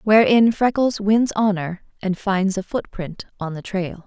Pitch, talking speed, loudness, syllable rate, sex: 200 Hz, 160 wpm, -20 LUFS, 4.1 syllables/s, female